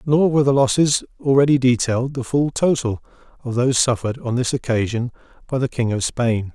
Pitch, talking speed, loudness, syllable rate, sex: 125 Hz, 185 wpm, -19 LUFS, 5.8 syllables/s, male